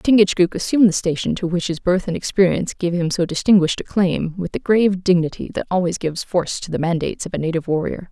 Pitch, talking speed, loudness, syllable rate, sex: 180 Hz, 230 wpm, -19 LUFS, 6.7 syllables/s, female